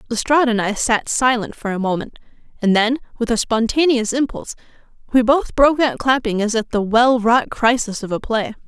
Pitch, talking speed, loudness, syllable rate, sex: 230 Hz, 195 wpm, -18 LUFS, 5.4 syllables/s, female